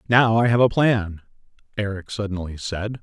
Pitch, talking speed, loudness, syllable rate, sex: 105 Hz, 160 wpm, -21 LUFS, 5.0 syllables/s, male